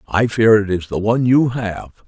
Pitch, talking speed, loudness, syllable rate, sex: 110 Hz, 230 wpm, -16 LUFS, 5.0 syllables/s, male